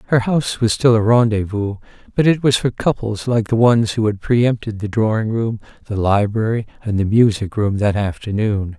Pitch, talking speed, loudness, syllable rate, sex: 110 Hz, 190 wpm, -17 LUFS, 5.1 syllables/s, male